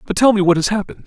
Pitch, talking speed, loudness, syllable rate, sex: 200 Hz, 335 wpm, -15 LUFS, 8.3 syllables/s, male